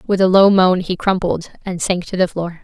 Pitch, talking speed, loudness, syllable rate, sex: 185 Hz, 250 wpm, -16 LUFS, 5.3 syllables/s, female